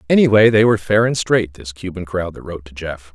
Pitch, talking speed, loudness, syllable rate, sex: 95 Hz, 250 wpm, -16 LUFS, 6.1 syllables/s, male